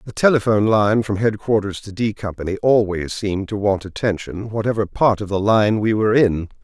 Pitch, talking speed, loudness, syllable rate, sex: 105 Hz, 190 wpm, -19 LUFS, 5.5 syllables/s, male